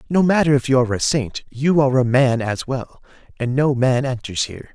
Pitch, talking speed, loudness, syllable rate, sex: 130 Hz, 225 wpm, -19 LUFS, 5.6 syllables/s, male